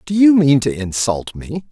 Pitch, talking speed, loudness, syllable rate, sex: 145 Hz, 210 wpm, -15 LUFS, 4.5 syllables/s, male